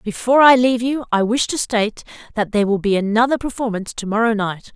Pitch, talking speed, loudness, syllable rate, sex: 225 Hz, 200 wpm, -17 LUFS, 6.5 syllables/s, female